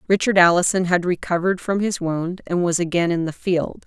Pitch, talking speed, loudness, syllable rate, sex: 175 Hz, 200 wpm, -20 LUFS, 5.5 syllables/s, female